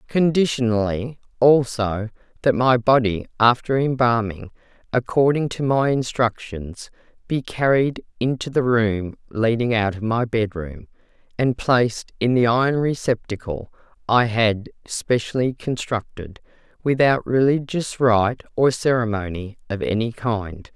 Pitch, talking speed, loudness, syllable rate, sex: 120 Hz, 115 wpm, -21 LUFS, 4.2 syllables/s, female